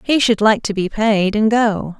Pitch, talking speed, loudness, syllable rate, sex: 215 Hz, 240 wpm, -16 LUFS, 4.2 syllables/s, female